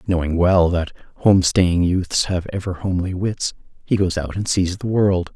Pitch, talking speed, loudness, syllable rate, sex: 90 Hz, 190 wpm, -19 LUFS, 4.6 syllables/s, male